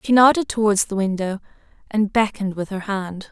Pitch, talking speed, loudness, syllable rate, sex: 205 Hz, 180 wpm, -20 LUFS, 5.5 syllables/s, female